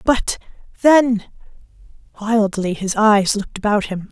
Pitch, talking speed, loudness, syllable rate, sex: 215 Hz, 115 wpm, -17 LUFS, 4.2 syllables/s, female